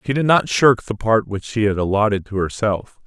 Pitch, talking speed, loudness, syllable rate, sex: 110 Hz, 235 wpm, -18 LUFS, 5.1 syllables/s, male